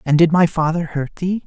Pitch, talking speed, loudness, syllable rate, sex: 165 Hz, 245 wpm, -17 LUFS, 5.2 syllables/s, male